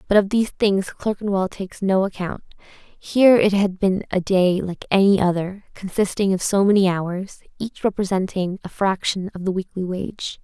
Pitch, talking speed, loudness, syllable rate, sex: 190 Hz, 175 wpm, -20 LUFS, 4.8 syllables/s, female